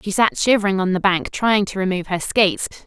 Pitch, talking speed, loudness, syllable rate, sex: 195 Hz, 230 wpm, -19 LUFS, 6.2 syllables/s, female